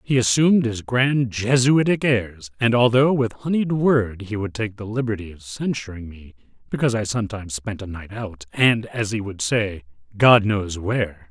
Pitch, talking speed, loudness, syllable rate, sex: 110 Hz, 180 wpm, -21 LUFS, 4.8 syllables/s, male